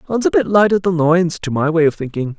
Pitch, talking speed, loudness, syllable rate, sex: 165 Hz, 300 wpm, -16 LUFS, 5.9 syllables/s, male